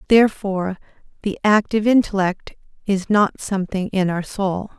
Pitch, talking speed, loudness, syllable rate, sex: 195 Hz, 125 wpm, -20 LUFS, 5.3 syllables/s, female